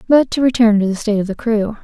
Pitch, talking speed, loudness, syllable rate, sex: 220 Hz, 295 wpm, -15 LUFS, 6.7 syllables/s, female